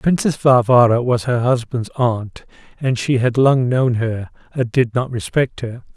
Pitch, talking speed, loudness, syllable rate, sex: 125 Hz, 170 wpm, -17 LUFS, 4.2 syllables/s, male